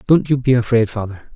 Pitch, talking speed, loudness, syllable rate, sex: 120 Hz, 220 wpm, -17 LUFS, 5.8 syllables/s, male